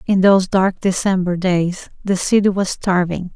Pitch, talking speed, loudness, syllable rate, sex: 185 Hz, 160 wpm, -17 LUFS, 4.6 syllables/s, female